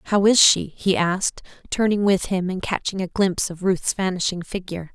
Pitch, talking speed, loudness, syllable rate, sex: 190 Hz, 195 wpm, -21 LUFS, 5.2 syllables/s, female